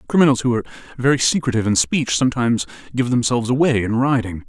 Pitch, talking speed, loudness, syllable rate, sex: 125 Hz, 175 wpm, -18 LUFS, 7.3 syllables/s, male